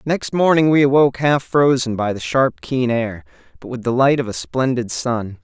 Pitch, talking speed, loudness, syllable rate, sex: 125 Hz, 210 wpm, -17 LUFS, 4.9 syllables/s, male